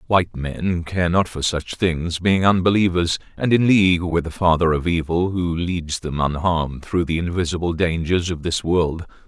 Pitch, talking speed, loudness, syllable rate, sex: 85 Hz, 180 wpm, -20 LUFS, 4.7 syllables/s, male